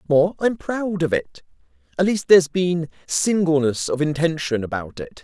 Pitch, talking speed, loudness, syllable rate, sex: 155 Hz, 160 wpm, -20 LUFS, 4.6 syllables/s, male